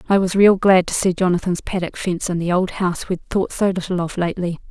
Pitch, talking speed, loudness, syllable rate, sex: 180 Hz, 240 wpm, -19 LUFS, 6.1 syllables/s, female